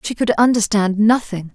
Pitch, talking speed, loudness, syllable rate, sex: 215 Hz, 155 wpm, -16 LUFS, 5.0 syllables/s, female